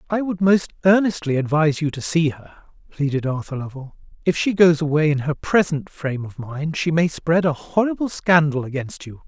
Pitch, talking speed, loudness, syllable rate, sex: 155 Hz, 195 wpm, -20 LUFS, 5.2 syllables/s, male